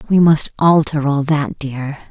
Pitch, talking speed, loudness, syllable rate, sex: 145 Hz, 170 wpm, -15 LUFS, 4.0 syllables/s, female